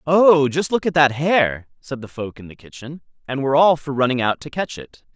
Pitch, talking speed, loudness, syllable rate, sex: 140 Hz, 245 wpm, -18 LUFS, 5.2 syllables/s, male